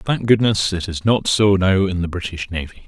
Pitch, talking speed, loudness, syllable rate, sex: 95 Hz, 230 wpm, -18 LUFS, 5.2 syllables/s, male